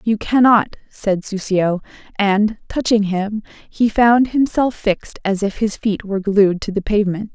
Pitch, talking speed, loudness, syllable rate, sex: 205 Hz, 165 wpm, -17 LUFS, 4.3 syllables/s, female